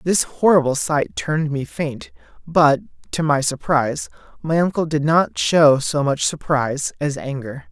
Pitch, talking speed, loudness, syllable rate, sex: 150 Hz, 155 wpm, -19 LUFS, 4.5 syllables/s, male